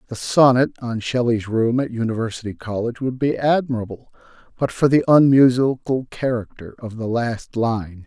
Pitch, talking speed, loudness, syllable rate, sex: 120 Hz, 150 wpm, -19 LUFS, 5.2 syllables/s, male